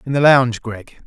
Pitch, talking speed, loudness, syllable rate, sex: 125 Hz, 225 wpm, -14 LUFS, 5.8 syllables/s, male